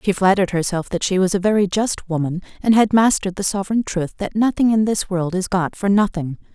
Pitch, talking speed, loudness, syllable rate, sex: 195 Hz, 230 wpm, -19 LUFS, 5.9 syllables/s, female